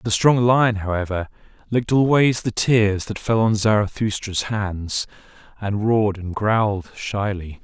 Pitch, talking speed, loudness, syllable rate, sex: 105 Hz, 140 wpm, -20 LUFS, 4.3 syllables/s, male